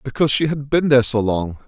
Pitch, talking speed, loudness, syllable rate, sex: 130 Hz, 250 wpm, -18 LUFS, 6.6 syllables/s, male